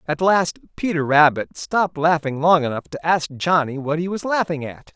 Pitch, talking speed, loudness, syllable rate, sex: 155 Hz, 195 wpm, -20 LUFS, 4.8 syllables/s, male